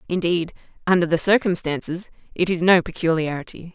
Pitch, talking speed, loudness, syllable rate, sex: 175 Hz, 130 wpm, -21 LUFS, 5.6 syllables/s, female